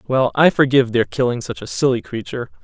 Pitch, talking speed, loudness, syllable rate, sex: 130 Hz, 205 wpm, -18 LUFS, 6.4 syllables/s, male